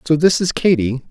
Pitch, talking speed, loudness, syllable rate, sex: 155 Hz, 215 wpm, -16 LUFS, 5.1 syllables/s, male